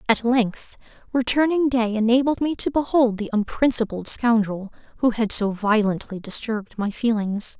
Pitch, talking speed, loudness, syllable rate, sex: 230 Hz, 140 wpm, -21 LUFS, 4.7 syllables/s, female